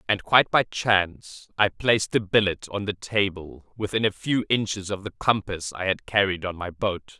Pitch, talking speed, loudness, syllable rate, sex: 100 Hz, 200 wpm, -24 LUFS, 4.9 syllables/s, male